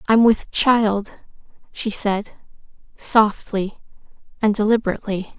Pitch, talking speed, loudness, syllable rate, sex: 210 Hz, 90 wpm, -20 LUFS, 4.0 syllables/s, female